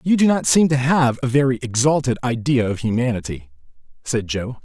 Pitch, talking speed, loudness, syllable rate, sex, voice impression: 125 Hz, 180 wpm, -19 LUFS, 5.4 syllables/s, male, masculine, adult-like, slightly thick, cool, sincere